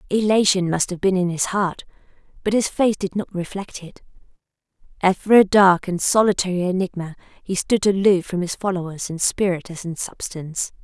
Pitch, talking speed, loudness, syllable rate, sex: 185 Hz, 170 wpm, -20 LUFS, 5.3 syllables/s, female